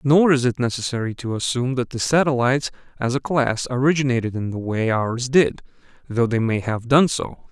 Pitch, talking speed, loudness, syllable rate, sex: 125 Hz, 190 wpm, -21 LUFS, 5.5 syllables/s, male